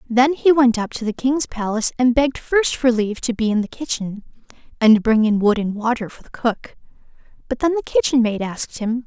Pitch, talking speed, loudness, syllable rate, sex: 235 Hz, 225 wpm, -19 LUFS, 5.5 syllables/s, female